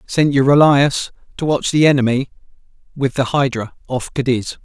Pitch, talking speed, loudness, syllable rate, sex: 135 Hz, 140 wpm, -16 LUFS, 4.9 syllables/s, male